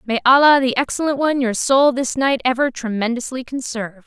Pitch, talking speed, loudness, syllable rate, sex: 255 Hz, 175 wpm, -17 LUFS, 5.7 syllables/s, female